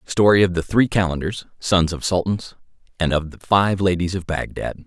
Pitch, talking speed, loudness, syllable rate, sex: 90 Hz, 185 wpm, -20 LUFS, 5.1 syllables/s, male